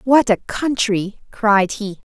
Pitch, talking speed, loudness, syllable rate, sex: 215 Hz, 140 wpm, -18 LUFS, 3.2 syllables/s, female